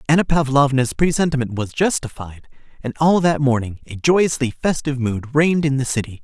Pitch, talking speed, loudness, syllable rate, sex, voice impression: 140 Hz, 165 wpm, -18 LUFS, 5.6 syllables/s, male, masculine, adult-like, bright, clear, fluent, intellectual, refreshing, friendly, lively, kind, light